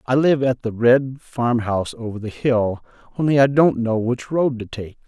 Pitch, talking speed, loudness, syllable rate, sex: 125 Hz, 215 wpm, -19 LUFS, 4.7 syllables/s, male